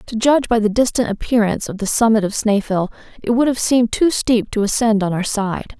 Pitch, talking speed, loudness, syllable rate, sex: 220 Hz, 230 wpm, -17 LUFS, 5.8 syllables/s, female